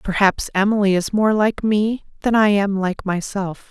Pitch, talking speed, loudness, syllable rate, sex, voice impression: 200 Hz, 180 wpm, -19 LUFS, 4.5 syllables/s, female, feminine, adult-like, tensed, powerful, soft, slightly muffled, calm, friendly, reassuring, elegant, kind, modest